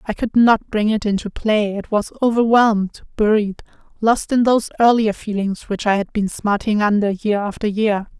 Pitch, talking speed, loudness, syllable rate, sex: 210 Hz, 185 wpm, -18 LUFS, 4.9 syllables/s, female